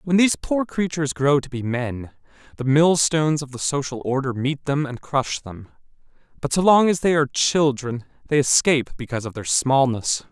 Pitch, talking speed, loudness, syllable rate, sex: 140 Hz, 185 wpm, -21 LUFS, 5.1 syllables/s, male